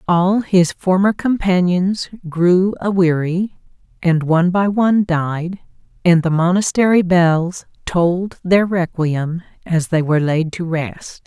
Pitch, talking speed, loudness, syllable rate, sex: 175 Hz, 130 wpm, -16 LUFS, 3.9 syllables/s, female